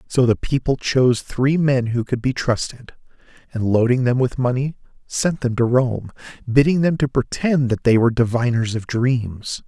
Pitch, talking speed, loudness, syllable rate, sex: 125 Hz, 180 wpm, -19 LUFS, 4.7 syllables/s, male